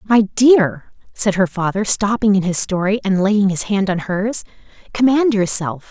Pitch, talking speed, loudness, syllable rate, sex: 205 Hz, 175 wpm, -16 LUFS, 4.4 syllables/s, female